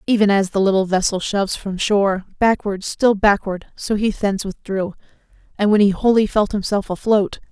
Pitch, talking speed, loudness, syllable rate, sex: 200 Hz, 175 wpm, -18 LUFS, 5.2 syllables/s, female